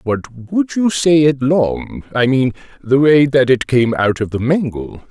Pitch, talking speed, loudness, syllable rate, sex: 135 Hz, 200 wpm, -15 LUFS, 3.9 syllables/s, male